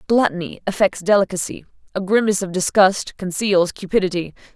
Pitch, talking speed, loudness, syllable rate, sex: 190 Hz, 120 wpm, -19 LUFS, 5.7 syllables/s, female